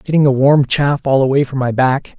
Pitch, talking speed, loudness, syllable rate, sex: 135 Hz, 245 wpm, -14 LUFS, 5.1 syllables/s, male